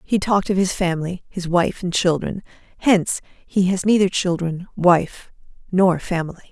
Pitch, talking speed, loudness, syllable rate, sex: 180 Hz, 145 wpm, -20 LUFS, 4.8 syllables/s, female